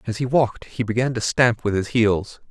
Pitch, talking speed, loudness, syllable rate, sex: 115 Hz, 240 wpm, -21 LUFS, 5.2 syllables/s, male